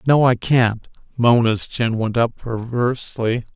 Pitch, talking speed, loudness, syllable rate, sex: 120 Hz, 135 wpm, -19 LUFS, 3.9 syllables/s, male